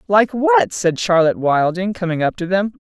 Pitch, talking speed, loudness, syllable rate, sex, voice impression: 175 Hz, 190 wpm, -17 LUFS, 5.0 syllables/s, female, very feminine, slightly gender-neutral, adult-like, slightly thin, tensed, powerful, bright, slightly soft, clear, fluent, slightly raspy, cool, very intellectual, refreshing, sincere, calm, very friendly, reassuring, unique, elegant, very wild, slightly sweet, lively, kind, slightly intense